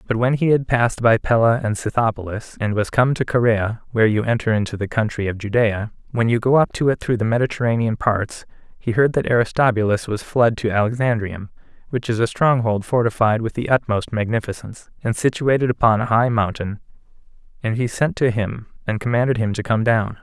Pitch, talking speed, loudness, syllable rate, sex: 115 Hz, 200 wpm, -19 LUFS, 5.7 syllables/s, male